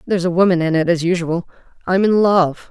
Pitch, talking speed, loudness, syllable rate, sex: 175 Hz, 200 wpm, -16 LUFS, 6.0 syllables/s, female